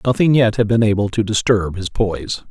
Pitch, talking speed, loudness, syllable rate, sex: 105 Hz, 215 wpm, -17 LUFS, 5.5 syllables/s, male